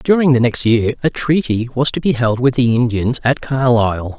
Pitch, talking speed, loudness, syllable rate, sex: 125 Hz, 215 wpm, -15 LUFS, 5.1 syllables/s, male